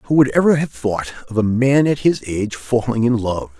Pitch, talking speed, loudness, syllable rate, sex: 120 Hz, 235 wpm, -18 LUFS, 5.1 syllables/s, male